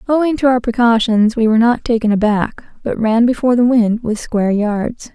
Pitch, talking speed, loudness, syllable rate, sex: 230 Hz, 200 wpm, -15 LUFS, 5.5 syllables/s, female